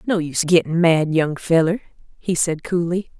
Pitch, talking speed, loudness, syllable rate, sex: 170 Hz, 170 wpm, -19 LUFS, 4.9 syllables/s, female